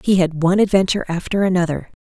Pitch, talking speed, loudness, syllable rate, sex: 180 Hz, 175 wpm, -18 LUFS, 7.1 syllables/s, female